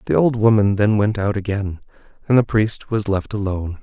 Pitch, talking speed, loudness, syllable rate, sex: 105 Hz, 205 wpm, -19 LUFS, 5.4 syllables/s, male